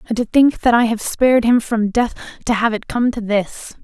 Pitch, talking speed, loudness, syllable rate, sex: 230 Hz, 250 wpm, -17 LUFS, 5.1 syllables/s, female